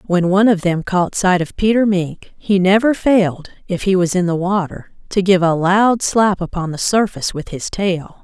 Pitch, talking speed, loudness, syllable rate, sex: 185 Hz, 195 wpm, -16 LUFS, 4.8 syllables/s, female